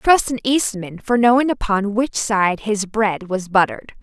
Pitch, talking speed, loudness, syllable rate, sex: 220 Hz, 180 wpm, -18 LUFS, 4.3 syllables/s, female